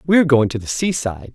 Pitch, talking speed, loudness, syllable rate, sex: 135 Hz, 225 wpm, -18 LUFS, 6.6 syllables/s, male